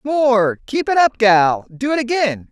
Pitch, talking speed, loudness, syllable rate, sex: 235 Hz, 190 wpm, -16 LUFS, 3.9 syllables/s, female